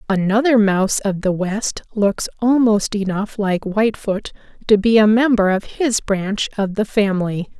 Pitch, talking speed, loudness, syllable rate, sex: 205 Hz, 160 wpm, -18 LUFS, 4.5 syllables/s, female